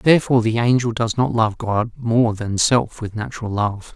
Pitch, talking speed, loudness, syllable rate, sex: 115 Hz, 195 wpm, -19 LUFS, 4.9 syllables/s, male